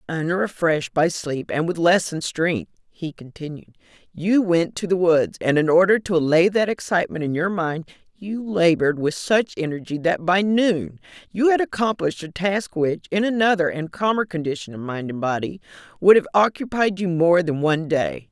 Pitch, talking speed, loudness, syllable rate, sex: 175 Hz, 180 wpm, -21 LUFS, 5.1 syllables/s, female